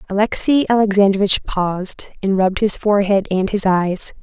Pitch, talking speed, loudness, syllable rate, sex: 200 Hz, 140 wpm, -17 LUFS, 5.2 syllables/s, female